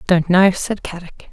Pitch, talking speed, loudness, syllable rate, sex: 185 Hz, 180 wpm, -16 LUFS, 5.3 syllables/s, female